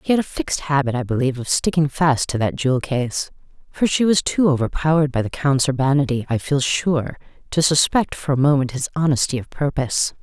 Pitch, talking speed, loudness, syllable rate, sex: 140 Hz, 205 wpm, -19 LUFS, 5.9 syllables/s, female